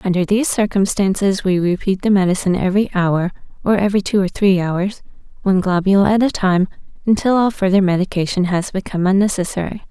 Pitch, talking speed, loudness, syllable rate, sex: 190 Hz, 165 wpm, -17 LUFS, 6.3 syllables/s, female